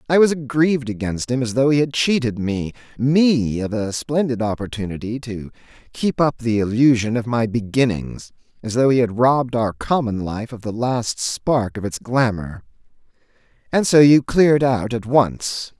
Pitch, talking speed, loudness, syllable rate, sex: 120 Hz, 165 wpm, -19 LUFS, 4.7 syllables/s, male